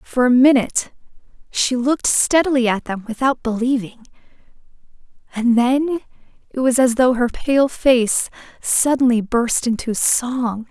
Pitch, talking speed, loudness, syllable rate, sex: 250 Hz, 130 wpm, -17 LUFS, 4.4 syllables/s, female